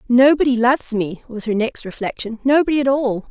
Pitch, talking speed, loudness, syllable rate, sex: 245 Hz, 165 wpm, -18 LUFS, 5.6 syllables/s, female